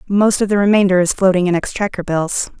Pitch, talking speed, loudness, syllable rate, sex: 190 Hz, 210 wpm, -15 LUFS, 5.9 syllables/s, female